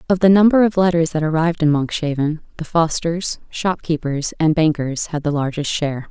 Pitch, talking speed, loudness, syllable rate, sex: 160 Hz, 175 wpm, -18 LUFS, 5.3 syllables/s, female